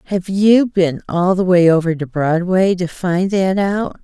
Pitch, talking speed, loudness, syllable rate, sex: 180 Hz, 195 wpm, -15 LUFS, 4.0 syllables/s, female